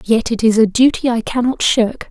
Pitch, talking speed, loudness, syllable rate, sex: 235 Hz, 230 wpm, -15 LUFS, 5.0 syllables/s, female